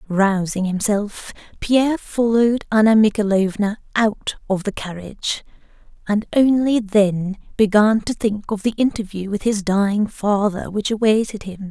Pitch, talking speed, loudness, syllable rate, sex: 210 Hz, 135 wpm, -19 LUFS, 4.4 syllables/s, female